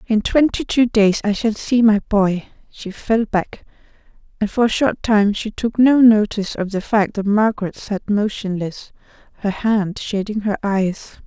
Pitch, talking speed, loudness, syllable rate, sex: 210 Hz, 175 wpm, -18 LUFS, 4.4 syllables/s, female